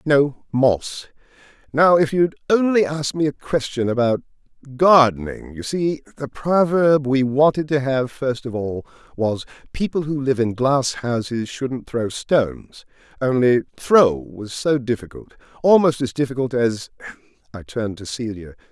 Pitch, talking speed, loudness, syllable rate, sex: 130 Hz, 145 wpm, -20 LUFS, 4.4 syllables/s, male